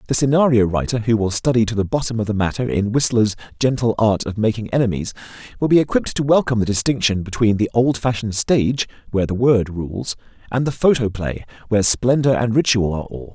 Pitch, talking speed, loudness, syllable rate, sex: 110 Hz, 195 wpm, -18 LUFS, 6.2 syllables/s, male